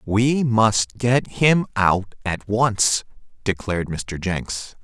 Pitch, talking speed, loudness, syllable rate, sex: 105 Hz, 125 wpm, -21 LUFS, 3.0 syllables/s, male